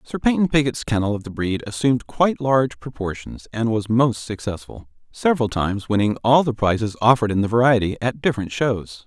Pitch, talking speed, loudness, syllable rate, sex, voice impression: 120 Hz, 185 wpm, -20 LUFS, 5.9 syllables/s, male, very masculine, slightly adult-like, slightly thick, very tensed, powerful, very bright, soft, slightly muffled, fluent, slightly raspy, cool, intellectual, very refreshing, sincere, calm, mature, very friendly, very reassuring, unique, elegant, wild, very sweet, lively, kind, slightly intense, slightly modest